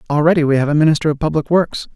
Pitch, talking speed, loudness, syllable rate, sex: 155 Hz, 245 wpm, -15 LUFS, 7.6 syllables/s, male